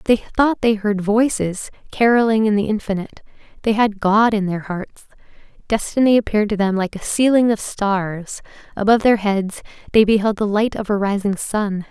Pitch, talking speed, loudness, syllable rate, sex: 210 Hz, 175 wpm, -18 LUFS, 5.1 syllables/s, female